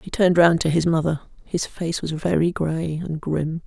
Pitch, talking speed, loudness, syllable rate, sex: 165 Hz, 215 wpm, -22 LUFS, 4.9 syllables/s, female